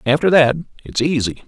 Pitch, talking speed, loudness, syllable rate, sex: 145 Hz, 165 wpm, -16 LUFS, 5.7 syllables/s, male